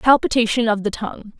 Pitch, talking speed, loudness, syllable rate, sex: 225 Hz, 170 wpm, -19 LUFS, 6.1 syllables/s, female